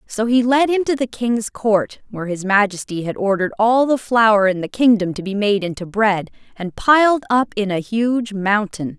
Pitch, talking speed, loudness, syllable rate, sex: 215 Hz, 205 wpm, -17 LUFS, 4.8 syllables/s, female